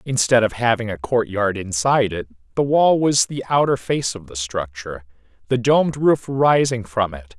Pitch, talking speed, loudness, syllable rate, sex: 115 Hz, 180 wpm, -19 LUFS, 4.9 syllables/s, male